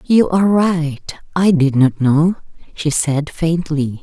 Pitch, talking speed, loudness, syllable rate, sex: 160 Hz, 135 wpm, -16 LUFS, 3.6 syllables/s, female